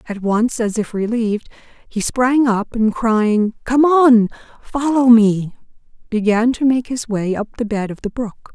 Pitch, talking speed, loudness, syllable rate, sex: 230 Hz, 175 wpm, -17 LUFS, 4.3 syllables/s, female